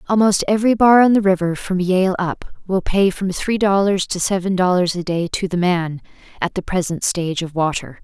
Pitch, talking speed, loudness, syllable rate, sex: 185 Hz, 210 wpm, -18 LUFS, 5.3 syllables/s, female